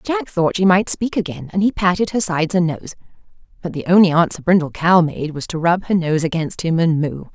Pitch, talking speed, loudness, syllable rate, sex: 175 Hz, 235 wpm, -17 LUFS, 5.5 syllables/s, female